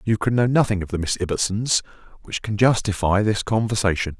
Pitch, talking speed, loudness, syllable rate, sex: 105 Hz, 185 wpm, -21 LUFS, 5.7 syllables/s, male